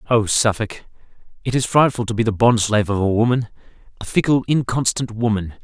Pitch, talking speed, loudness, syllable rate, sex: 115 Hz, 160 wpm, -19 LUFS, 5.9 syllables/s, male